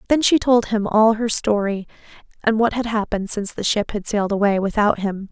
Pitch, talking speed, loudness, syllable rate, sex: 215 Hz, 215 wpm, -19 LUFS, 5.7 syllables/s, female